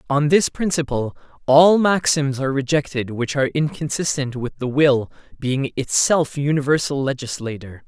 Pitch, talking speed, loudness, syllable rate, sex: 140 Hz, 130 wpm, -19 LUFS, 4.8 syllables/s, male